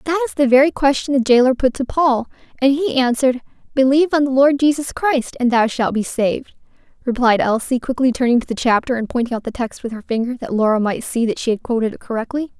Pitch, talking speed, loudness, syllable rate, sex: 255 Hz, 235 wpm, -17 LUFS, 6.3 syllables/s, female